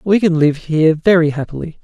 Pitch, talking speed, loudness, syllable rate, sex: 165 Hz, 195 wpm, -14 LUFS, 5.8 syllables/s, male